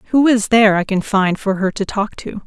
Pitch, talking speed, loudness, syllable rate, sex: 210 Hz, 270 wpm, -16 LUFS, 5.5 syllables/s, female